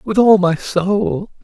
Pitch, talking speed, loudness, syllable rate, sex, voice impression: 195 Hz, 170 wpm, -15 LUFS, 3.1 syllables/s, male, masculine, very middle-aged, thick, slightly tensed, slightly powerful, bright, soft, clear, fluent, slightly raspy, cool, slightly intellectual, refreshing, slightly sincere, calm, mature, very friendly, reassuring, unique, slightly elegant, wild, slightly sweet, very lively, kind, intense, slightly sharp, light